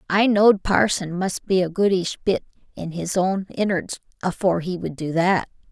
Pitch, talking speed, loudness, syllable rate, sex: 185 Hz, 180 wpm, -21 LUFS, 4.9 syllables/s, female